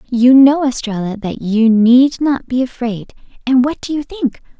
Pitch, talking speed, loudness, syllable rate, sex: 250 Hz, 185 wpm, -14 LUFS, 4.4 syllables/s, female